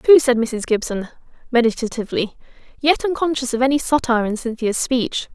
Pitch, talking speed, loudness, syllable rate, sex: 250 Hz, 145 wpm, -19 LUFS, 5.7 syllables/s, female